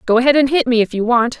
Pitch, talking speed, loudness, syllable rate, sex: 250 Hz, 345 wpm, -14 LUFS, 7.1 syllables/s, female